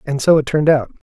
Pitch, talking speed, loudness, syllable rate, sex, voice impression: 145 Hz, 270 wpm, -15 LUFS, 7.3 syllables/s, male, masculine, very adult-like, slightly cool, friendly, reassuring